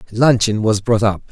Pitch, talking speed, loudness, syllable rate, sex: 110 Hz, 180 wpm, -16 LUFS, 4.9 syllables/s, male